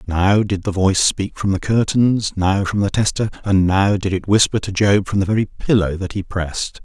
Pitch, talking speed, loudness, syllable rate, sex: 100 Hz, 230 wpm, -18 LUFS, 5.1 syllables/s, male